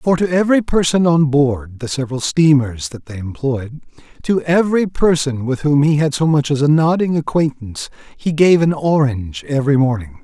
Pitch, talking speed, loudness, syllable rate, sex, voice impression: 145 Hz, 175 wpm, -16 LUFS, 5.3 syllables/s, male, masculine, adult-like, soft, slightly muffled, slightly sincere, friendly